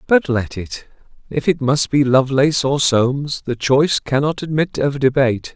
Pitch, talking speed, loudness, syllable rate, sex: 135 Hz, 160 wpm, -17 LUFS, 5.0 syllables/s, male